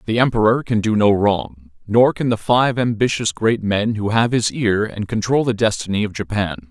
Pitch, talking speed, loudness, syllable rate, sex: 110 Hz, 205 wpm, -18 LUFS, 4.9 syllables/s, male